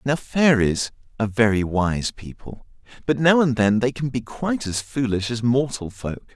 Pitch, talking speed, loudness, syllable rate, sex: 120 Hz, 180 wpm, -21 LUFS, 4.7 syllables/s, male